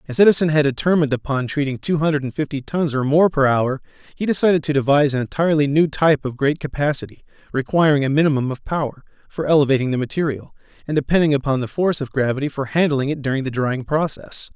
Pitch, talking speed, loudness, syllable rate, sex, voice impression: 145 Hz, 200 wpm, -19 LUFS, 6.3 syllables/s, male, masculine, adult-like, slightly powerful, clear, fluent, intellectual, slightly mature, wild, slightly lively, strict, slightly sharp